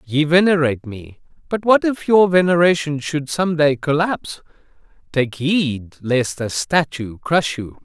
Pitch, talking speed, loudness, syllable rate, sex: 150 Hz, 145 wpm, -18 LUFS, 4.2 syllables/s, male